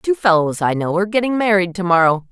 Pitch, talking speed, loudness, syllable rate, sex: 190 Hz, 235 wpm, -16 LUFS, 6.2 syllables/s, female